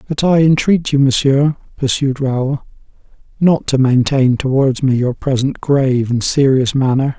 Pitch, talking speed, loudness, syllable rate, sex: 135 Hz, 150 wpm, -14 LUFS, 4.5 syllables/s, male